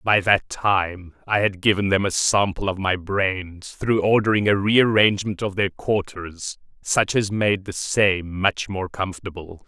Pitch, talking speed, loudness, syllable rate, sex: 100 Hz, 165 wpm, -21 LUFS, 4.1 syllables/s, male